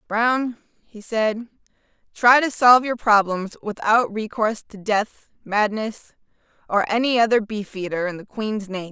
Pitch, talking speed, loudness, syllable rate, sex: 215 Hz, 135 wpm, -20 LUFS, 4.7 syllables/s, female